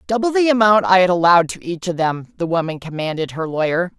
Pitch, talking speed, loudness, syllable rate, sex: 180 Hz, 225 wpm, -17 LUFS, 6.1 syllables/s, female